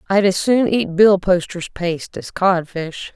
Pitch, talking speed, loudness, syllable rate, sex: 185 Hz, 150 wpm, -17 LUFS, 4.2 syllables/s, female